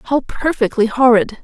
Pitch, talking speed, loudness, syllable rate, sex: 240 Hz, 125 wpm, -15 LUFS, 4.6 syllables/s, female